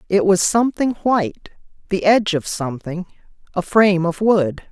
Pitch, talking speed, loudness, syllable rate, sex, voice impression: 185 Hz, 155 wpm, -18 LUFS, 5.4 syllables/s, female, feminine, middle-aged, calm, reassuring, slightly elegant